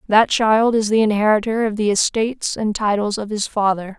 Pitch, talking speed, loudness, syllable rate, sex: 215 Hz, 195 wpm, -18 LUFS, 5.3 syllables/s, female